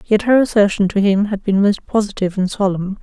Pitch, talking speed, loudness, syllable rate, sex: 205 Hz, 220 wpm, -16 LUFS, 5.8 syllables/s, female